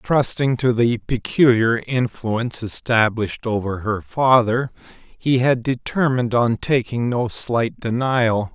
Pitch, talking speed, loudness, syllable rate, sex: 120 Hz, 120 wpm, -19 LUFS, 3.9 syllables/s, male